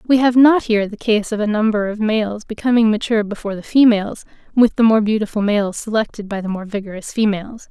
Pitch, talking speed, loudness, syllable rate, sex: 215 Hz, 210 wpm, -17 LUFS, 6.2 syllables/s, female